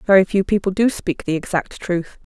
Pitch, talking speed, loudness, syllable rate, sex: 190 Hz, 205 wpm, -20 LUFS, 5.3 syllables/s, female